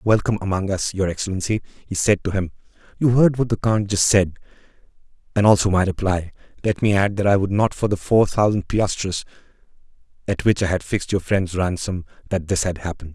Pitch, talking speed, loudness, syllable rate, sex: 95 Hz, 200 wpm, -20 LUFS, 5.9 syllables/s, male